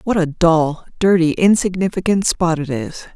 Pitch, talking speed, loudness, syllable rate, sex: 175 Hz, 150 wpm, -16 LUFS, 4.6 syllables/s, female